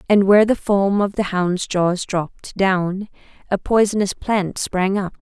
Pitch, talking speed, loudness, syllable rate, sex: 195 Hz, 170 wpm, -19 LUFS, 4.1 syllables/s, female